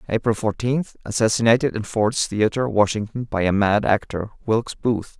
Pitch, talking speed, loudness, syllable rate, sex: 110 Hz, 150 wpm, -21 LUFS, 5.0 syllables/s, male